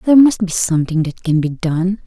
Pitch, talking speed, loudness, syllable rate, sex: 180 Hz, 230 wpm, -16 LUFS, 5.8 syllables/s, female